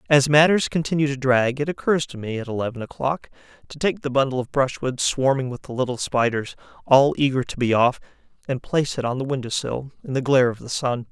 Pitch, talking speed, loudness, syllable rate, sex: 135 Hz, 220 wpm, -22 LUFS, 5.9 syllables/s, male